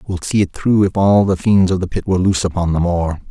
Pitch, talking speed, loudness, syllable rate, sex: 95 Hz, 290 wpm, -16 LUFS, 6.2 syllables/s, male